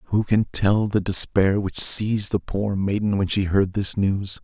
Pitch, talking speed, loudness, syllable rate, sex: 100 Hz, 205 wpm, -21 LUFS, 4.3 syllables/s, male